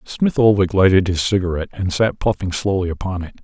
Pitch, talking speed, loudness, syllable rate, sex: 95 Hz, 190 wpm, -18 LUFS, 5.9 syllables/s, male